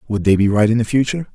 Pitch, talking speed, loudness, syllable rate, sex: 115 Hz, 310 wpm, -16 LUFS, 7.6 syllables/s, male